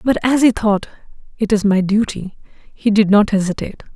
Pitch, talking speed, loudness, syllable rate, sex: 210 Hz, 180 wpm, -16 LUFS, 5.4 syllables/s, female